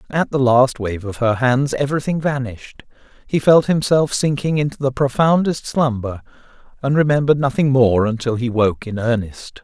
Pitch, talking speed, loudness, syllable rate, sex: 130 Hz, 160 wpm, -17 LUFS, 5.4 syllables/s, male